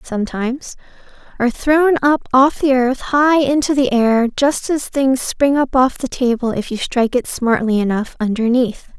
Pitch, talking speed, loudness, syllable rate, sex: 255 Hz, 165 wpm, -16 LUFS, 4.6 syllables/s, female